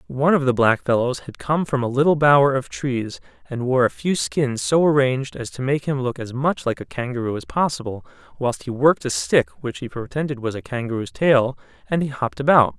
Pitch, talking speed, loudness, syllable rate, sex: 130 Hz, 215 wpm, -21 LUFS, 5.5 syllables/s, male